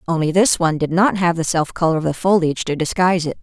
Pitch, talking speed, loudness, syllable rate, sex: 170 Hz, 265 wpm, -17 LUFS, 6.8 syllables/s, female